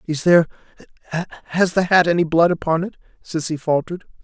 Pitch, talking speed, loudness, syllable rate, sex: 165 Hz, 140 wpm, -19 LUFS, 6.4 syllables/s, male